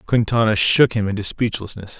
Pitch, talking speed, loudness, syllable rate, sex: 110 Hz, 150 wpm, -18 LUFS, 5.4 syllables/s, male